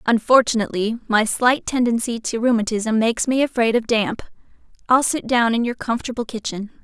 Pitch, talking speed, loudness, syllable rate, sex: 230 Hz, 160 wpm, -19 LUFS, 5.5 syllables/s, female